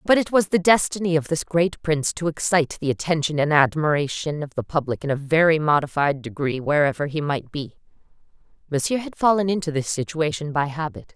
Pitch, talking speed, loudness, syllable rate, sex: 155 Hz, 190 wpm, -22 LUFS, 5.8 syllables/s, female